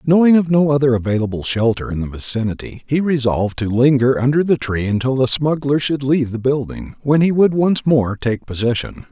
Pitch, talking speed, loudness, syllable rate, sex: 135 Hz, 195 wpm, -17 LUFS, 5.6 syllables/s, male